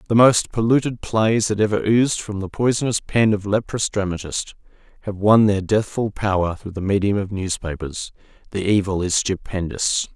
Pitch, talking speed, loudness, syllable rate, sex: 100 Hz, 165 wpm, -20 LUFS, 5.0 syllables/s, male